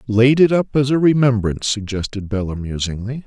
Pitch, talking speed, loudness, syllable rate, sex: 115 Hz, 165 wpm, -18 LUFS, 5.5 syllables/s, male